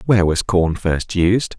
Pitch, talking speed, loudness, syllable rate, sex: 95 Hz, 190 wpm, -17 LUFS, 4.1 syllables/s, male